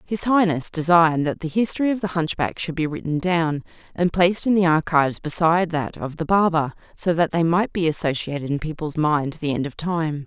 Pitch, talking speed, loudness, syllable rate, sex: 165 Hz, 215 wpm, -21 LUFS, 5.6 syllables/s, female